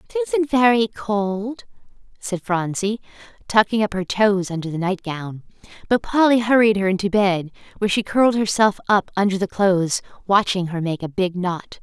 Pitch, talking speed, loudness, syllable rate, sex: 205 Hz, 165 wpm, -20 LUFS, 5.0 syllables/s, female